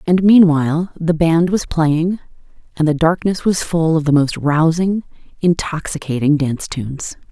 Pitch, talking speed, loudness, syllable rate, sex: 160 Hz, 150 wpm, -16 LUFS, 4.6 syllables/s, female